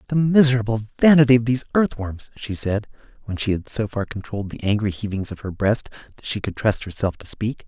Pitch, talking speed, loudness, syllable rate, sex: 110 Hz, 220 wpm, -21 LUFS, 6.0 syllables/s, male